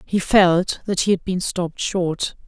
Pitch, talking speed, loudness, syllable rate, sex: 180 Hz, 195 wpm, -20 LUFS, 4.1 syllables/s, female